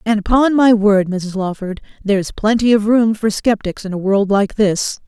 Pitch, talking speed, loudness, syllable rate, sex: 210 Hz, 200 wpm, -15 LUFS, 4.5 syllables/s, female